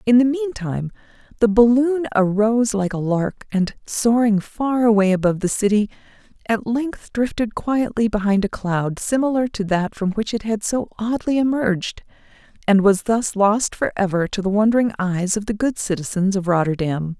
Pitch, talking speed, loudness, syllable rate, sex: 215 Hz, 165 wpm, -20 LUFS, 4.9 syllables/s, female